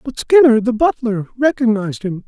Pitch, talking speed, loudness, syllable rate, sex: 235 Hz, 105 wpm, -15 LUFS, 5.3 syllables/s, male